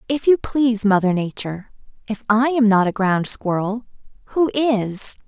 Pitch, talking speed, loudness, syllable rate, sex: 225 Hz, 160 wpm, -19 LUFS, 4.7 syllables/s, female